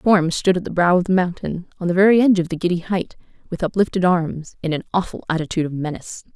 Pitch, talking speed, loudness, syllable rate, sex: 175 Hz, 245 wpm, -19 LUFS, 6.9 syllables/s, female